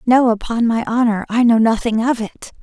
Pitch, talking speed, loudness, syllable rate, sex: 230 Hz, 205 wpm, -16 LUFS, 5.2 syllables/s, female